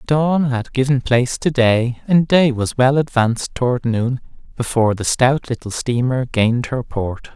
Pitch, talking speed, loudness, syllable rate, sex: 125 Hz, 170 wpm, -17 LUFS, 4.5 syllables/s, male